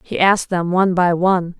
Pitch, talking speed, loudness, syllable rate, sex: 180 Hz, 225 wpm, -16 LUFS, 6.0 syllables/s, female